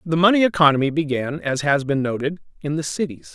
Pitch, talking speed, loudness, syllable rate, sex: 150 Hz, 195 wpm, -20 LUFS, 6.0 syllables/s, male